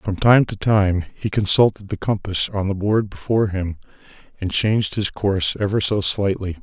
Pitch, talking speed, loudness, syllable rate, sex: 100 Hz, 180 wpm, -19 LUFS, 5.0 syllables/s, male